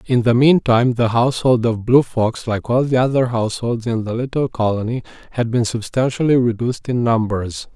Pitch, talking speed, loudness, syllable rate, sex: 120 Hz, 180 wpm, -18 LUFS, 5.4 syllables/s, male